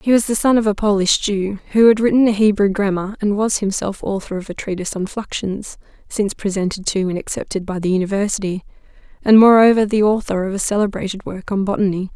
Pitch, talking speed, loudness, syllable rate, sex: 200 Hz, 200 wpm, -17 LUFS, 4.8 syllables/s, female